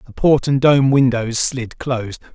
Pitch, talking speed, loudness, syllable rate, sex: 130 Hz, 180 wpm, -16 LUFS, 4.3 syllables/s, male